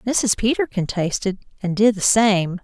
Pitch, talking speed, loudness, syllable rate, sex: 205 Hz, 160 wpm, -19 LUFS, 4.2 syllables/s, female